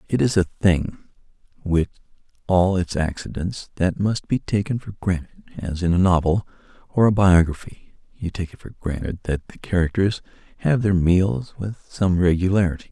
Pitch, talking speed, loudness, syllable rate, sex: 95 Hz, 165 wpm, -22 LUFS, 5.0 syllables/s, male